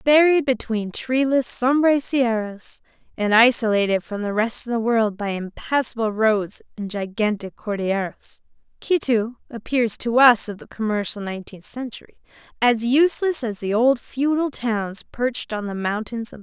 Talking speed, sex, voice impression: 155 wpm, female, feminine, slightly adult-like, slightly cute, slightly intellectual, friendly, slightly sweet